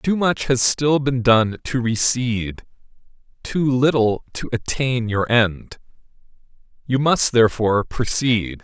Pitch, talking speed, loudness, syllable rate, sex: 120 Hz, 125 wpm, -19 LUFS, 3.9 syllables/s, male